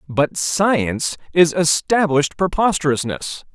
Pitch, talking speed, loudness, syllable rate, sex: 160 Hz, 85 wpm, -18 LUFS, 4.2 syllables/s, male